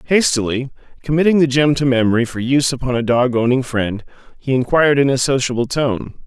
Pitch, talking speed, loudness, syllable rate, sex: 130 Hz, 180 wpm, -16 LUFS, 5.9 syllables/s, male